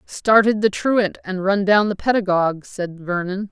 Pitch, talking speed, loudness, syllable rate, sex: 195 Hz, 170 wpm, -19 LUFS, 4.5 syllables/s, female